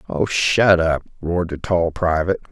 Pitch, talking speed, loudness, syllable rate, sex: 85 Hz, 165 wpm, -19 LUFS, 4.9 syllables/s, male